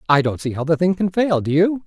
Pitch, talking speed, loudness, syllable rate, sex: 170 Hz, 320 wpm, -19 LUFS, 5.9 syllables/s, male